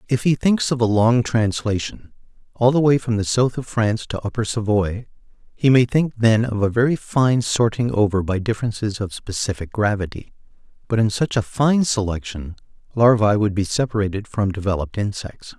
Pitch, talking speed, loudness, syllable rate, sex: 110 Hz, 170 wpm, -20 LUFS, 5.2 syllables/s, male